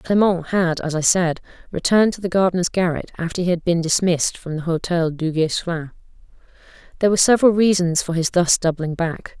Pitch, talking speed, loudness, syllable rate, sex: 175 Hz, 180 wpm, -19 LUFS, 5.8 syllables/s, female